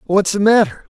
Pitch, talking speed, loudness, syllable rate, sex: 190 Hz, 190 wpm, -15 LUFS, 5.4 syllables/s, male